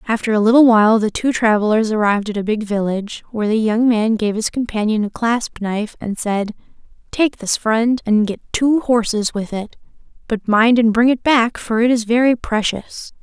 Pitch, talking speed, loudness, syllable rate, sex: 225 Hz, 200 wpm, -17 LUFS, 5.1 syllables/s, female